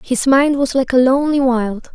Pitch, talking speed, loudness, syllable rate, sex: 260 Hz, 215 wpm, -15 LUFS, 5.0 syllables/s, female